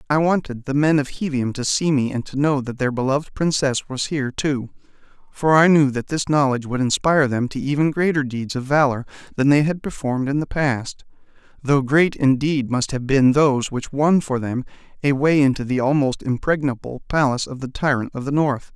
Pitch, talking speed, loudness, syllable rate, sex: 140 Hz, 210 wpm, -20 LUFS, 5.4 syllables/s, male